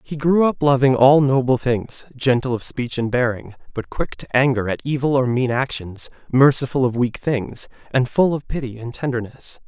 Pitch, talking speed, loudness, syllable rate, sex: 130 Hz, 190 wpm, -19 LUFS, 5.0 syllables/s, male